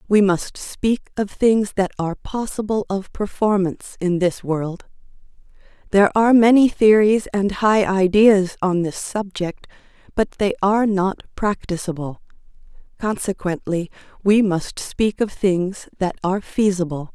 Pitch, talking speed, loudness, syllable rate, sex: 195 Hz, 130 wpm, -19 LUFS, 4.3 syllables/s, female